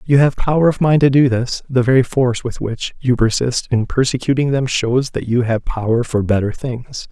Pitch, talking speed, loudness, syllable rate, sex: 125 Hz, 220 wpm, -17 LUFS, 5.1 syllables/s, male